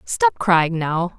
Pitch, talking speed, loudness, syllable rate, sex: 190 Hz, 150 wpm, -19 LUFS, 2.8 syllables/s, female